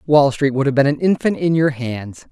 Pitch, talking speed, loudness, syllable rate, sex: 140 Hz, 260 wpm, -17 LUFS, 5.1 syllables/s, male